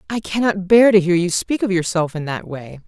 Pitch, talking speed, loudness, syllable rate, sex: 185 Hz, 250 wpm, -17 LUFS, 5.3 syllables/s, female